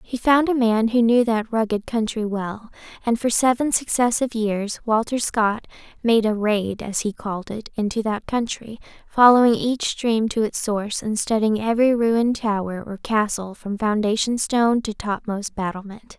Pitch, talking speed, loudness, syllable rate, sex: 220 Hz, 170 wpm, -21 LUFS, 4.7 syllables/s, female